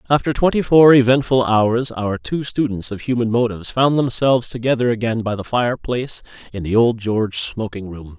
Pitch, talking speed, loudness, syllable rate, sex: 120 Hz, 175 wpm, -18 LUFS, 5.5 syllables/s, male